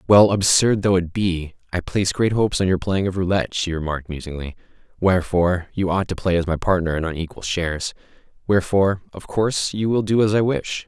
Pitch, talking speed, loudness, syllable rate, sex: 90 Hz, 210 wpm, -21 LUFS, 6.1 syllables/s, male